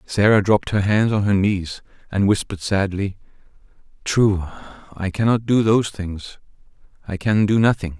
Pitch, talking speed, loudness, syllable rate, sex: 100 Hz, 145 wpm, -19 LUFS, 5.0 syllables/s, male